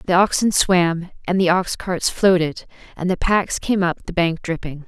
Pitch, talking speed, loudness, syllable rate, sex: 180 Hz, 195 wpm, -19 LUFS, 4.5 syllables/s, female